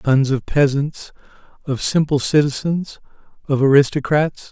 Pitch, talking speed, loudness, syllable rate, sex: 140 Hz, 105 wpm, -18 LUFS, 4.3 syllables/s, male